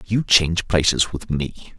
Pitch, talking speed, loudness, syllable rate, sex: 90 Hz, 170 wpm, -19 LUFS, 4.4 syllables/s, male